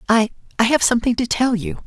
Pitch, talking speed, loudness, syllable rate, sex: 235 Hz, 195 wpm, -18 LUFS, 6.7 syllables/s, female